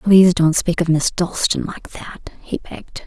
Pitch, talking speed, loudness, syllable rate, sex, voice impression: 170 Hz, 195 wpm, -17 LUFS, 4.7 syllables/s, female, very feminine, very middle-aged, thin, slightly relaxed, slightly weak, bright, slightly soft, clear, fluent, slightly raspy, slightly cool, intellectual, slightly refreshing, sincere, very calm, friendly, reassuring, very unique, elegant, wild, lively, kind, slightly intense